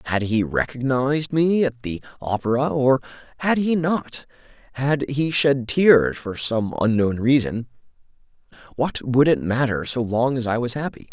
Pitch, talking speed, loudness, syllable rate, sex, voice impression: 130 Hz, 155 wpm, -21 LUFS, 4.4 syllables/s, male, masculine, adult-like, refreshing, sincere, elegant, slightly sweet